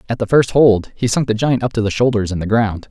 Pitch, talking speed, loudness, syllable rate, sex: 110 Hz, 310 wpm, -16 LUFS, 5.9 syllables/s, male